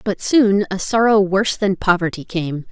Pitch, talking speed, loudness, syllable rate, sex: 195 Hz, 175 wpm, -17 LUFS, 4.7 syllables/s, female